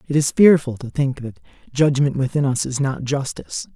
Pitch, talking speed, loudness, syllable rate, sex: 140 Hz, 190 wpm, -19 LUFS, 5.3 syllables/s, male